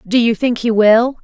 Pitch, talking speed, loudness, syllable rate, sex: 230 Hz, 245 wpm, -14 LUFS, 4.6 syllables/s, female